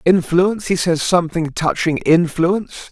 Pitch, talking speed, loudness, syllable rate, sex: 170 Hz, 125 wpm, -17 LUFS, 4.9 syllables/s, male